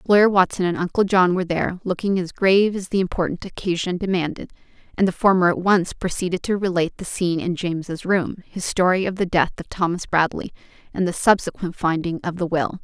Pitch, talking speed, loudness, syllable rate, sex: 180 Hz, 200 wpm, -21 LUFS, 6.0 syllables/s, female